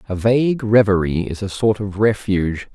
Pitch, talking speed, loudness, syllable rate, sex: 105 Hz, 175 wpm, -18 LUFS, 5.1 syllables/s, male